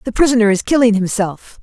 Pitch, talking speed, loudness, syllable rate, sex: 220 Hz, 185 wpm, -14 LUFS, 6.0 syllables/s, female